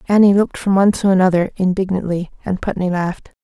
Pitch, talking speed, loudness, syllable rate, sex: 185 Hz, 175 wpm, -17 LUFS, 6.7 syllables/s, female